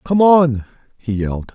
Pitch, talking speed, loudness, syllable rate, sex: 135 Hz, 155 wpm, -15 LUFS, 4.4 syllables/s, male